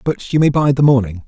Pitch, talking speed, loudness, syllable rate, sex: 130 Hz, 285 wpm, -14 LUFS, 6.0 syllables/s, male